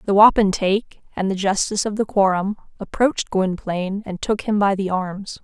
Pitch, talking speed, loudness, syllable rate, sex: 200 Hz, 175 wpm, -20 LUFS, 5.3 syllables/s, female